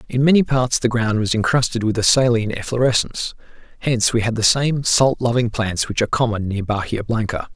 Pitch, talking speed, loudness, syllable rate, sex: 115 Hz, 200 wpm, -18 LUFS, 5.8 syllables/s, male